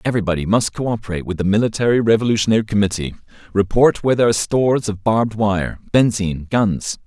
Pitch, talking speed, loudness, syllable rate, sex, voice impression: 105 Hz, 155 wpm, -18 LUFS, 6.7 syllables/s, male, masculine, adult-like, slightly clear, slightly fluent, cool, refreshing, sincere